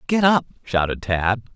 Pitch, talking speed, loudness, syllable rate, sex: 120 Hz, 155 wpm, -21 LUFS, 4.4 syllables/s, male